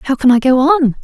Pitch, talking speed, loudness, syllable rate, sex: 270 Hz, 290 wpm, -12 LUFS, 5.2 syllables/s, female